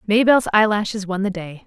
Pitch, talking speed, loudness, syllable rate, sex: 205 Hz, 180 wpm, -18 LUFS, 6.1 syllables/s, female